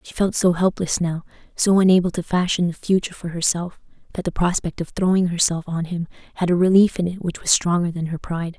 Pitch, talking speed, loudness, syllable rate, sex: 175 Hz, 225 wpm, -20 LUFS, 6.0 syllables/s, female